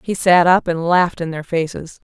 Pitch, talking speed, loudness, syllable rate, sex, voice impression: 175 Hz, 230 wpm, -16 LUFS, 5.2 syllables/s, female, very feminine, very adult-like, thin, tensed, slightly powerful, bright, slightly soft, very clear, slightly fluent, raspy, cool, slightly intellectual, refreshing, sincere, slightly calm, slightly friendly, slightly reassuring, unique, slightly elegant, wild, slightly sweet, lively, kind, slightly modest